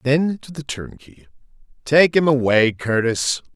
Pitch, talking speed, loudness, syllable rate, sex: 135 Hz, 135 wpm, -18 LUFS, 4.0 syllables/s, male